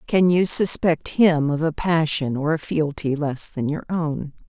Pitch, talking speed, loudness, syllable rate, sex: 155 Hz, 190 wpm, -21 LUFS, 4.1 syllables/s, female